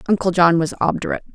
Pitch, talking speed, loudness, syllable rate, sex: 175 Hz, 180 wpm, -18 LUFS, 7.8 syllables/s, female